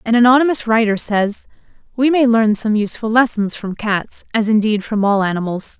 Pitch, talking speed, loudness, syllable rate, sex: 220 Hz, 175 wpm, -16 LUFS, 5.3 syllables/s, female